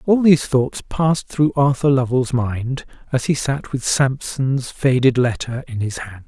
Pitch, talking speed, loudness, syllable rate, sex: 130 Hz, 170 wpm, -19 LUFS, 4.3 syllables/s, male